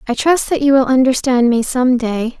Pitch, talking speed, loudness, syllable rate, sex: 255 Hz, 225 wpm, -14 LUFS, 5.0 syllables/s, female